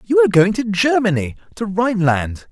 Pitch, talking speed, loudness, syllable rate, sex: 180 Hz, 145 wpm, -17 LUFS, 5.4 syllables/s, male